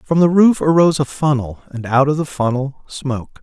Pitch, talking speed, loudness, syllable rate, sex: 145 Hz, 210 wpm, -16 LUFS, 5.2 syllables/s, male